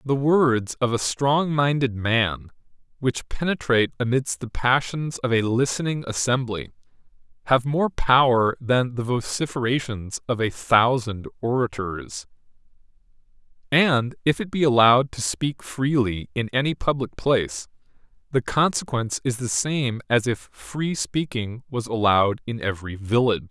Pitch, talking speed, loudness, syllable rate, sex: 125 Hz, 135 wpm, -23 LUFS, 4.5 syllables/s, male